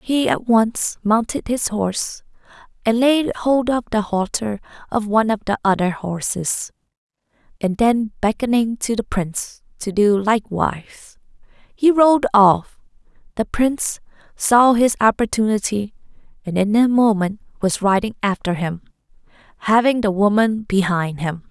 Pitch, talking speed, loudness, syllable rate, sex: 215 Hz, 135 wpm, -18 LUFS, 4.4 syllables/s, female